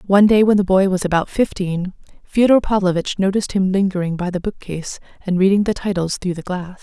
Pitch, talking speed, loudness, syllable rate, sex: 190 Hz, 200 wpm, -18 LUFS, 6.1 syllables/s, female